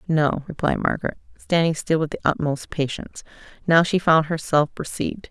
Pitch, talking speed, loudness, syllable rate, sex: 160 Hz, 160 wpm, -22 LUFS, 5.4 syllables/s, female